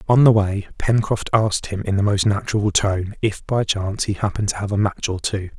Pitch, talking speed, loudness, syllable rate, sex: 100 Hz, 235 wpm, -20 LUFS, 5.7 syllables/s, male